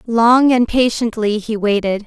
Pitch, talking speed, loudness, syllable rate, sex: 225 Hz, 145 wpm, -15 LUFS, 4.2 syllables/s, female